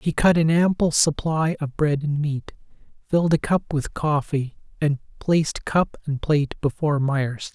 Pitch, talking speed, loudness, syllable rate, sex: 150 Hz, 165 wpm, -22 LUFS, 4.5 syllables/s, male